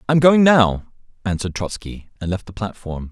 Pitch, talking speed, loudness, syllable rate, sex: 110 Hz, 175 wpm, -19 LUFS, 5.1 syllables/s, male